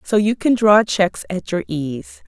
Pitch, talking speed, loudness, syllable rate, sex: 195 Hz, 210 wpm, -18 LUFS, 4.4 syllables/s, female